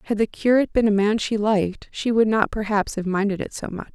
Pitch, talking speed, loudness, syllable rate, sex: 210 Hz, 260 wpm, -22 LUFS, 6.0 syllables/s, female